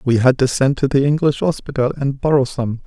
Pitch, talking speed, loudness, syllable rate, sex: 135 Hz, 230 wpm, -17 LUFS, 5.6 syllables/s, male